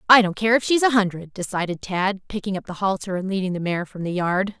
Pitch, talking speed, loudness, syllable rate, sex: 195 Hz, 260 wpm, -22 LUFS, 6.1 syllables/s, female